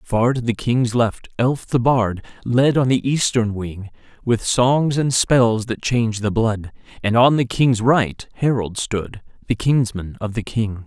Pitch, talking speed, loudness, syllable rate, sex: 115 Hz, 180 wpm, -19 LUFS, 3.9 syllables/s, male